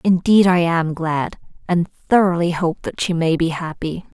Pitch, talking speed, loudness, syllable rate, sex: 170 Hz, 170 wpm, -18 LUFS, 4.3 syllables/s, female